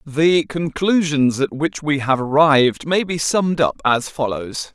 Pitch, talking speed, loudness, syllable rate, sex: 150 Hz, 165 wpm, -18 LUFS, 4.2 syllables/s, male